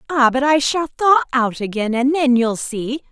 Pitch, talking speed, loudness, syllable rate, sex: 260 Hz, 210 wpm, -17 LUFS, 4.7 syllables/s, female